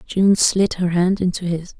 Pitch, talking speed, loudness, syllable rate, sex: 180 Hz, 200 wpm, -18 LUFS, 4.2 syllables/s, female